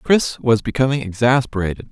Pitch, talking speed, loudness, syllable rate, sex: 125 Hz, 125 wpm, -18 LUFS, 5.4 syllables/s, male